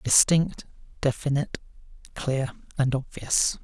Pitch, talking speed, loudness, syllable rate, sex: 140 Hz, 85 wpm, -25 LUFS, 4.1 syllables/s, male